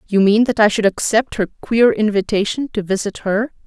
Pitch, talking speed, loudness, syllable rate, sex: 215 Hz, 195 wpm, -17 LUFS, 5.3 syllables/s, female